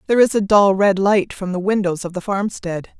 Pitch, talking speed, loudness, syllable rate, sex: 195 Hz, 240 wpm, -18 LUFS, 5.3 syllables/s, female